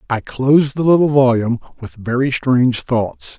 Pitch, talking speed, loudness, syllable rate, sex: 130 Hz, 160 wpm, -16 LUFS, 5.0 syllables/s, male